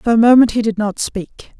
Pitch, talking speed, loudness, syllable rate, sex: 220 Hz, 265 wpm, -14 LUFS, 5.2 syllables/s, female